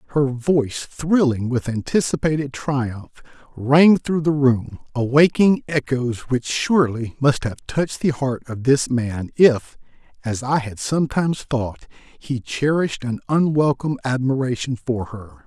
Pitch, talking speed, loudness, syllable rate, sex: 135 Hz, 135 wpm, -20 LUFS, 4.3 syllables/s, male